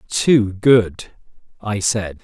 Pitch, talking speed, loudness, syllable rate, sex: 105 Hz, 105 wpm, -16 LUFS, 2.5 syllables/s, male